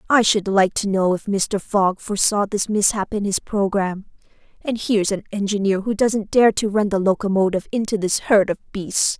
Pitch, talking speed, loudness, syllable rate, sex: 200 Hz, 195 wpm, -20 LUFS, 5.1 syllables/s, female